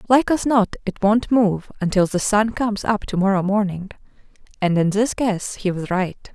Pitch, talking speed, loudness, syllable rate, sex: 205 Hz, 190 wpm, -20 LUFS, 4.7 syllables/s, female